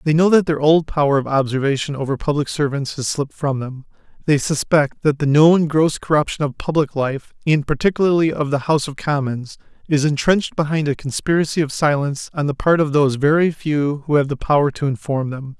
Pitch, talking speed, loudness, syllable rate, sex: 145 Hz, 205 wpm, -18 LUFS, 5.7 syllables/s, male